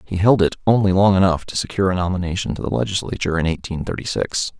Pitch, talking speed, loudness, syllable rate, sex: 95 Hz, 220 wpm, -19 LUFS, 6.9 syllables/s, male